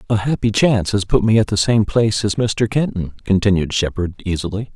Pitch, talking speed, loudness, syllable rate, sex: 105 Hz, 200 wpm, -18 LUFS, 5.7 syllables/s, male